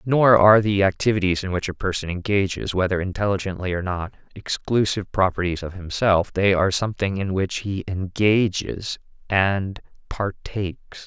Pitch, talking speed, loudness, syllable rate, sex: 95 Hz, 140 wpm, -22 LUFS, 5.0 syllables/s, male